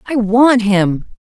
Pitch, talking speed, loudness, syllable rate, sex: 220 Hz, 145 wpm, -13 LUFS, 3.4 syllables/s, female